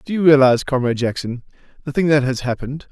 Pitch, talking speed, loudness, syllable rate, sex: 135 Hz, 205 wpm, -17 LUFS, 7.1 syllables/s, male